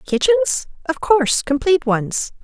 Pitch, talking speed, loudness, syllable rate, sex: 270 Hz, 75 wpm, -18 LUFS, 5.1 syllables/s, female